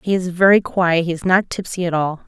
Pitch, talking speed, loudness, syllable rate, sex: 180 Hz, 235 wpm, -17 LUFS, 5.5 syllables/s, female